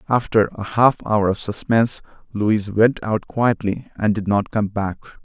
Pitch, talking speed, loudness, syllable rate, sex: 105 Hz, 170 wpm, -20 LUFS, 4.6 syllables/s, male